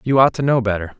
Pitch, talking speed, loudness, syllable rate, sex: 120 Hz, 300 wpm, -17 LUFS, 6.8 syllables/s, male